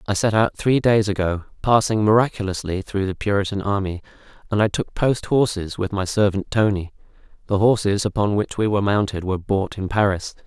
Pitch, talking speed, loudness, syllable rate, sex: 100 Hz, 185 wpm, -21 LUFS, 5.6 syllables/s, male